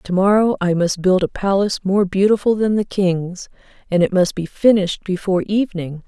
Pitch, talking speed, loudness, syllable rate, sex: 190 Hz, 190 wpm, -17 LUFS, 5.4 syllables/s, female